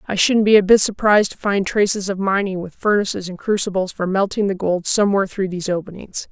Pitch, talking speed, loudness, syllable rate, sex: 195 Hz, 220 wpm, -18 LUFS, 6.2 syllables/s, female